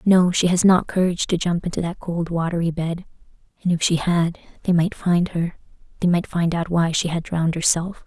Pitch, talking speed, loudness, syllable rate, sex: 170 Hz, 210 wpm, -21 LUFS, 5.4 syllables/s, female